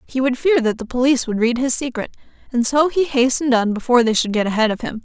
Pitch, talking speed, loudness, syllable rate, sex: 250 Hz, 260 wpm, -18 LUFS, 6.7 syllables/s, female